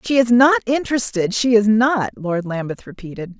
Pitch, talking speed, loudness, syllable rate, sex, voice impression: 220 Hz, 160 wpm, -17 LUFS, 5.1 syllables/s, female, very feminine, very adult-like, middle-aged, slightly thin, slightly tensed, slightly powerful, slightly bright, hard, clear, fluent, slightly cool, intellectual, refreshing, sincere, calm, slightly friendly, reassuring, unique, elegant, slightly wild, slightly sweet, slightly lively, kind, slightly sharp, slightly modest